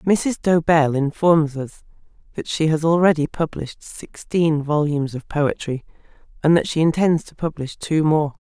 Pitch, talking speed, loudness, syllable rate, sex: 155 Hz, 150 wpm, -20 LUFS, 4.6 syllables/s, female